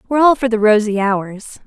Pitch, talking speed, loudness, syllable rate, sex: 225 Hz, 215 wpm, -15 LUFS, 5.6 syllables/s, female